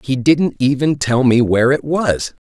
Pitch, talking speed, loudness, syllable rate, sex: 135 Hz, 195 wpm, -15 LUFS, 4.4 syllables/s, male